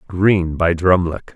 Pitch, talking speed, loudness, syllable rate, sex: 90 Hz, 135 wpm, -17 LUFS, 3.8 syllables/s, male